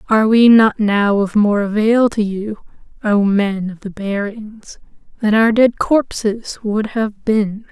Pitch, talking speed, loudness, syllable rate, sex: 215 Hz, 165 wpm, -15 LUFS, 3.8 syllables/s, female